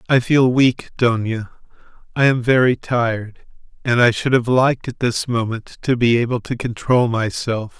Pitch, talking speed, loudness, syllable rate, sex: 120 Hz, 170 wpm, -18 LUFS, 4.6 syllables/s, male